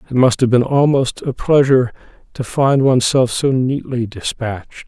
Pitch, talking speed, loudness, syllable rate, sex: 125 Hz, 160 wpm, -16 LUFS, 5.0 syllables/s, male